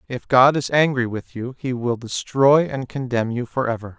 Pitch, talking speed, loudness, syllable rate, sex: 125 Hz, 195 wpm, -20 LUFS, 4.8 syllables/s, male